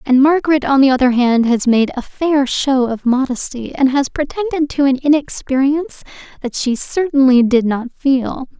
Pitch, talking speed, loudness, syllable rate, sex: 270 Hz, 175 wpm, -15 LUFS, 4.8 syllables/s, female